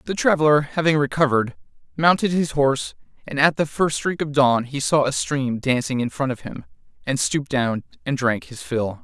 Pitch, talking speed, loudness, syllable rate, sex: 140 Hz, 200 wpm, -21 LUFS, 5.2 syllables/s, male